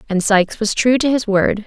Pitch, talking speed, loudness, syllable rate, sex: 220 Hz, 250 wpm, -16 LUFS, 5.4 syllables/s, female